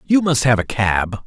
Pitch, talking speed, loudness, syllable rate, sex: 125 Hz, 235 wpm, -17 LUFS, 4.5 syllables/s, male